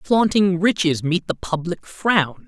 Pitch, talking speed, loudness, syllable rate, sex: 180 Hz, 145 wpm, -20 LUFS, 3.8 syllables/s, male